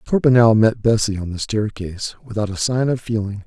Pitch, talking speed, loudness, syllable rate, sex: 110 Hz, 190 wpm, -19 LUFS, 5.5 syllables/s, male